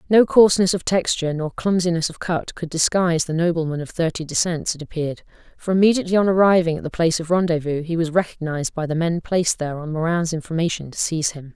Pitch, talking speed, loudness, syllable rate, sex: 165 Hz, 210 wpm, -20 LUFS, 6.6 syllables/s, female